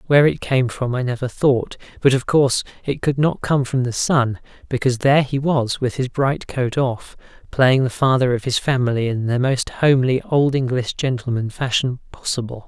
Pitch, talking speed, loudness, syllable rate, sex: 130 Hz, 195 wpm, -19 LUFS, 5.1 syllables/s, male